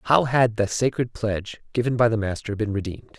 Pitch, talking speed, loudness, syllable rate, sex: 115 Hz, 205 wpm, -23 LUFS, 6.1 syllables/s, male